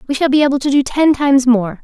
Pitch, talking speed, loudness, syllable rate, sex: 270 Hz, 295 wpm, -13 LUFS, 6.6 syllables/s, female